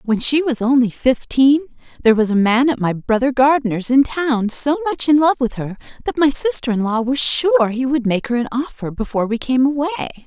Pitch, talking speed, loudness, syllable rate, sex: 260 Hz, 220 wpm, -17 LUFS, 5.4 syllables/s, female